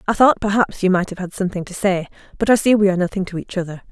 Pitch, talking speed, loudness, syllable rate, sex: 195 Hz, 290 wpm, -19 LUFS, 7.4 syllables/s, female